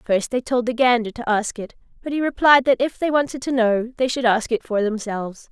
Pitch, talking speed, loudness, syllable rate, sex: 240 Hz, 250 wpm, -20 LUFS, 5.6 syllables/s, female